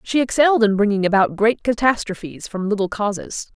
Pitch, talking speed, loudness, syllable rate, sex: 210 Hz, 170 wpm, -19 LUFS, 5.6 syllables/s, female